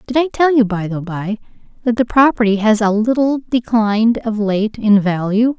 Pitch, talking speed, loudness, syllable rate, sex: 225 Hz, 195 wpm, -15 LUFS, 4.8 syllables/s, female